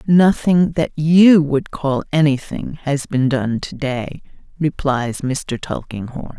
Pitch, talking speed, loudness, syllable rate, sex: 145 Hz, 130 wpm, -18 LUFS, 3.4 syllables/s, female